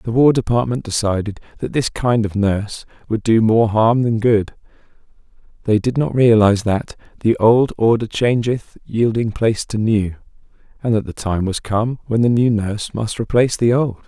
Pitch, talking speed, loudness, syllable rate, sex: 110 Hz, 180 wpm, -17 LUFS, 4.9 syllables/s, male